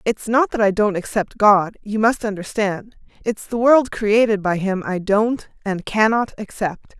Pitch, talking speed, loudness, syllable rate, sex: 210 Hz, 180 wpm, -19 LUFS, 4.3 syllables/s, female